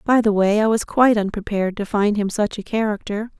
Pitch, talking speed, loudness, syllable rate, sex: 210 Hz, 230 wpm, -19 LUFS, 5.9 syllables/s, female